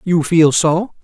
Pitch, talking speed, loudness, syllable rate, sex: 165 Hz, 175 wpm, -14 LUFS, 3.4 syllables/s, male